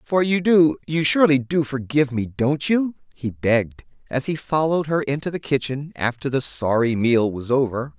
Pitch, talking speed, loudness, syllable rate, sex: 140 Hz, 180 wpm, -21 LUFS, 5.1 syllables/s, male